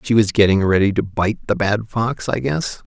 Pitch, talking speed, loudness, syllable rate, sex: 105 Hz, 225 wpm, -18 LUFS, 4.9 syllables/s, male